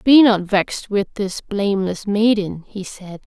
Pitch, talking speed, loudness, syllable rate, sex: 205 Hz, 160 wpm, -18 LUFS, 4.1 syllables/s, female